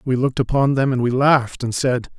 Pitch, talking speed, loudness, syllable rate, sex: 130 Hz, 245 wpm, -18 LUFS, 6.0 syllables/s, male